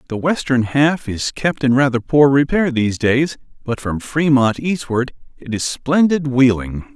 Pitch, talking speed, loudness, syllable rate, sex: 140 Hz, 165 wpm, -17 LUFS, 4.3 syllables/s, male